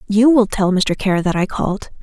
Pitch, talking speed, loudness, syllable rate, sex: 205 Hz, 235 wpm, -16 LUFS, 5.6 syllables/s, female